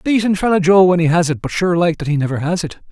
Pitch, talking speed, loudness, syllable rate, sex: 175 Hz, 310 wpm, -15 LUFS, 6.4 syllables/s, male